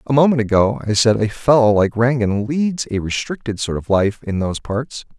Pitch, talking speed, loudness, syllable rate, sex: 115 Hz, 210 wpm, -17 LUFS, 5.1 syllables/s, male